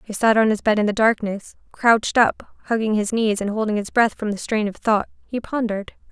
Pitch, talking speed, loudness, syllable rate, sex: 215 Hz, 235 wpm, -20 LUFS, 5.6 syllables/s, female